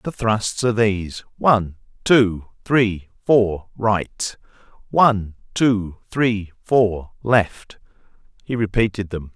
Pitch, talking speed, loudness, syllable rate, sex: 105 Hz, 110 wpm, -20 LUFS, 3.4 syllables/s, male